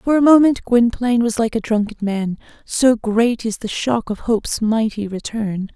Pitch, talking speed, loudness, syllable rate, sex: 225 Hz, 190 wpm, -18 LUFS, 4.7 syllables/s, female